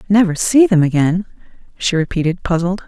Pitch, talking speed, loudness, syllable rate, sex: 185 Hz, 145 wpm, -15 LUFS, 5.5 syllables/s, female